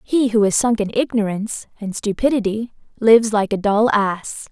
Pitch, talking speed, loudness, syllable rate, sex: 215 Hz, 175 wpm, -18 LUFS, 5.0 syllables/s, female